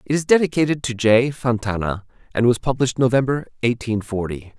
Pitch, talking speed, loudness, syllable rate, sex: 120 Hz, 155 wpm, -20 LUFS, 5.8 syllables/s, male